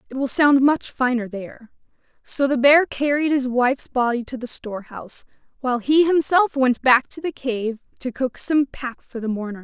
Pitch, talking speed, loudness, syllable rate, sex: 260 Hz, 195 wpm, -20 LUFS, 5.0 syllables/s, female